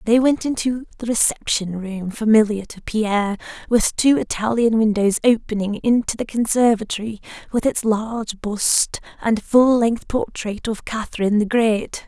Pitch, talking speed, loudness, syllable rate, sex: 220 Hz, 145 wpm, -19 LUFS, 4.6 syllables/s, female